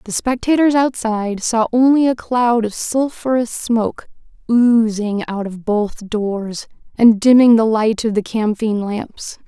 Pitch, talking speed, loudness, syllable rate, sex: 225 Hz, 145 wpm, -16 LUFS, 4.1 syllables/s, female